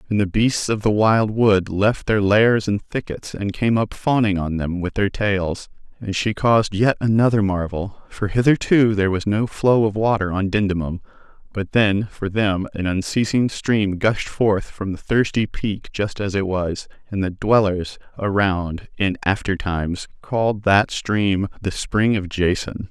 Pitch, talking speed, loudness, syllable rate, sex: 100 Hz, 180 wpm, -20 LUFS, 4.3 syllables/s, male